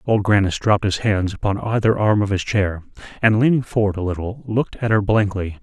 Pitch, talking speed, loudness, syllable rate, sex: 105 Hz, 215 wpm, -19 LUFS, 5.7 syllables/s, male